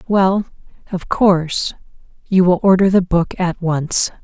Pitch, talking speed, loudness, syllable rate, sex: 180 Hz, 140 wpm, -16 LUFS, 3.9 syllables/s, female